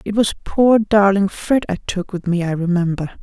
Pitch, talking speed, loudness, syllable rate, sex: 195 Hz, 205 wpm, -17 LUFS, 4.9 syllables/s, female